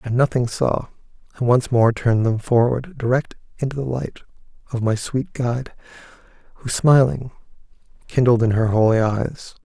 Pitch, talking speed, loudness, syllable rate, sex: 120 Hz, 150 wpm, -20 LUFS, 5.1 syllables/s, male